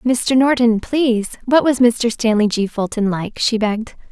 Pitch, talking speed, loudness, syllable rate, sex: 230 Hz, 175 wpm, -17 LUFS, 4.5 syllables/s, female